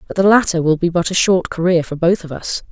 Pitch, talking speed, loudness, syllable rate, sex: 175 Hz, 290 wpm, -16 LUFS, 6.0 syllables/s, female